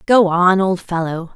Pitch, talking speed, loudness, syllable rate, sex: 180 Hz, 180 wpm, -16 LUFS, 4.1 syllables/s, female